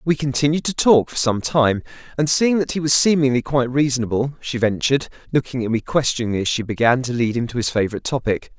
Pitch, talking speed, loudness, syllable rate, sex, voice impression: 130 Hz, 215 wpm, -19 LUFS, 6.4 syllables/s, male, masculine, adult-like, sincere, calm, slightly friendly, slightly reassuring